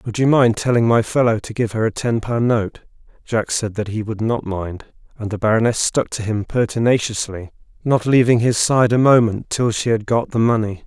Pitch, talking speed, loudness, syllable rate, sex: 115 Hz, 215 wpm, -18 LUFS, 5.1 syllables/s, male